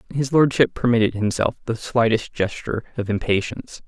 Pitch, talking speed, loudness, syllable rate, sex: 115 Hz, 140 wpm, -21 LUFS, 5.5 syllables/s, male